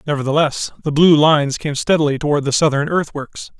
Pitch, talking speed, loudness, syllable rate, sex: 150 Hz, 165 wpm, -16 LUFS, 5.8 syllables/s, male